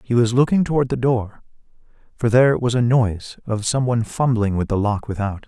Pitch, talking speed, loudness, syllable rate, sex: 120 Hz, 195 wpm, -19 LUFS, 5.7 syllables/s, male